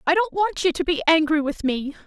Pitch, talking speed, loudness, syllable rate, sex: 330 Hz, 290 wpm, -21 LUFS, 6.1 syllables/s, female